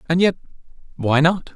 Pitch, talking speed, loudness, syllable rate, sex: 165 Hz, 115 wpm, -19 LUFS, 5.6 syllables/s, male